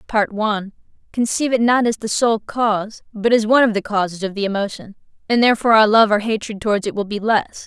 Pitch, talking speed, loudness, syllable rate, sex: 215 Hz, 225 wpm, -18 LUFS, 6.3 syllables/s, female